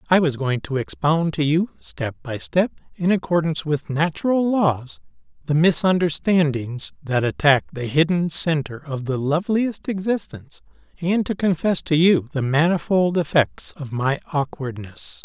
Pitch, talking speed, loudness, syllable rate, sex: 160 Hz, 145 wpm, -21 LUFS, 4.6 syllables/s, male